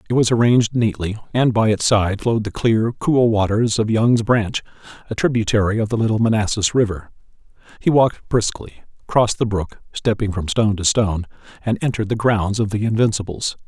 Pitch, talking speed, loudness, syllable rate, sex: 110 Hz, 180 wpm, -18 LUFS, 5.7 syllables/s, male